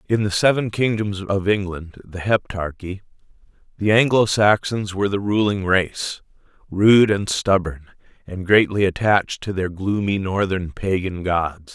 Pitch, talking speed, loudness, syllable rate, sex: 100 Hz, 130 wpm, -20 LUFS, 4.3 syllables/s, male